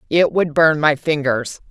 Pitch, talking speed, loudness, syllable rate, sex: 150 Hz, 175 wpm, -17 LUFS, 4.2 syllables/s, female